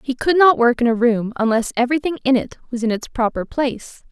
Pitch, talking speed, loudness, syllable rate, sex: 250 Hz, 235 wpm, -18 LUFS, 6.0 syllables/s, female